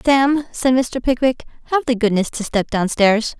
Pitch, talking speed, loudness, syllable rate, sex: 245 Hz, 175 wpm, -18 LUFS, 4.5 syllables/s, female